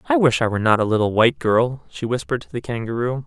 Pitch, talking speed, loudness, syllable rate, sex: 125 Hz, 255 wpm, -20 LUFS, 7.0 syllables/s, male